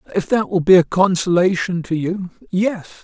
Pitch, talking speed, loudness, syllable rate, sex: 185 Hz, 180 wpm, -17 LUFS, 4.9 syllables/s, male